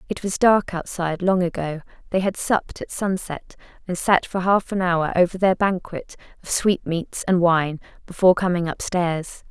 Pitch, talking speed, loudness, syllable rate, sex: 180 Hz, 170 wpm, -21 LUFS, 4.8 syllables/s, female